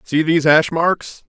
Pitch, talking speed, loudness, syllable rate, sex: 160 Hz, 175 wpm, -16 LUFS, 4.3 syllables/s, male